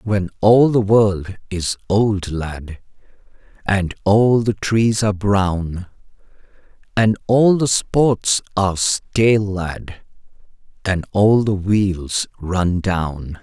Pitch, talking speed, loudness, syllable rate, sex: 100 Hz, 115 wpm, -18 LUFS, 3.0 syllables/s, male